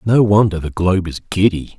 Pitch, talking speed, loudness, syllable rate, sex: 95 Hz, 200 wpm, -16 LUFS, 5.3 syllables/s, male